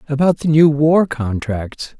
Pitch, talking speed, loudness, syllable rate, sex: 145 Hz, 150 wpm, -15 LUFS, 3.9 syllables/s, male